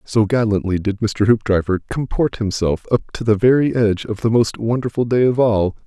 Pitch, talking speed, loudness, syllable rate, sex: 110 Hz, 195 wpm, -18 LUFS, 5.3 syllables/s, male